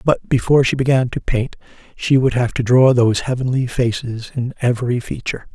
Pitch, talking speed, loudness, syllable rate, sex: 125 Hz, 185 wpm, -17 LUFS, 5.7 syllables/s, male